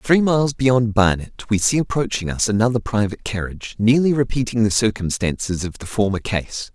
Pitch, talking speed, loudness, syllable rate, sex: 110 Hz, 170 wpm, -19 LUFS, 5.5 syllables/s, male